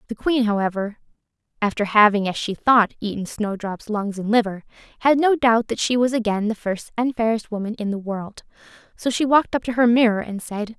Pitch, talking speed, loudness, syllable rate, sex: 220 Hz, 205 wpm, -21 LUFS, 5.5 syllables/s, female